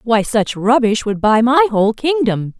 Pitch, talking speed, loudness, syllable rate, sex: 235 Hz, 185 wpm, -15 LUFS, 4.5 syllables/s, female